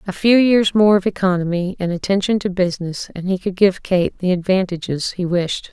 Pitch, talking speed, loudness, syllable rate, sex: 185 Hz, 200 wpm, -18 LUFS, 5.3 syllables/s, female